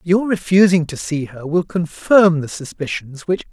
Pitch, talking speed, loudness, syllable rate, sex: 165 Hz, 170 wpm, -17 LUFS, 4.5 syllables/s, male